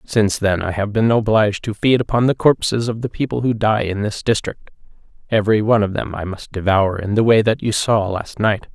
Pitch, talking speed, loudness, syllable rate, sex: 105 Hz, 235 wpm, -18 LUFS, 5.6 syllables/s, male